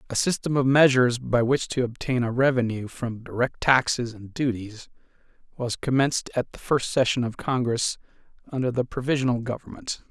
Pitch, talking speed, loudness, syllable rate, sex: 125 Hz, 160 wpm, -24 LUFS, 5.4 syllables/s, male